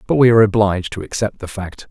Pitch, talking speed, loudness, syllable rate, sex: 105 Hz, 250 wpm, -16 LUFS, 6.9 syllables/s, male